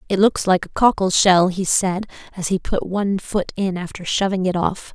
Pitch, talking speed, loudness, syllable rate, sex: 190 Hz, 220 wpm, -19 LUFS, 5.0 syllables/s, female